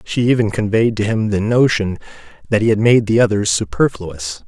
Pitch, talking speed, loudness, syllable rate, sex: 105 Hz, 190 wpm, -16 LUFS, 5.2 syllables/s, male